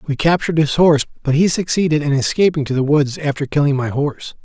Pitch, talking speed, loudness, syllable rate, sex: 150 Hz, 215 wpm, -16 LUFS, 6.4 syllables/s, male